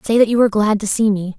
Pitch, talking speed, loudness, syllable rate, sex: 215 Hz, 345 wpm, -16 LUFS, 7.1 syllables/s, female